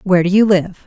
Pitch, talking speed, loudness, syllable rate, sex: 190 Hz, 275 wpm, -14 LUFS, 6.5 syllables/s, female